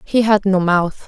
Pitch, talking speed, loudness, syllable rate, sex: 195 Hz, 225 wpm, -15 LUFS, 4.1 syllables/s, female